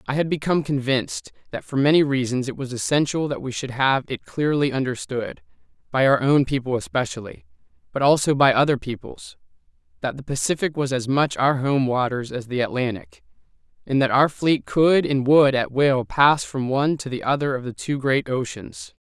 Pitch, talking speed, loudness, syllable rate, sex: 135 Hz, 190 wpm, -21 LUFS, 5.3 syllables/s, male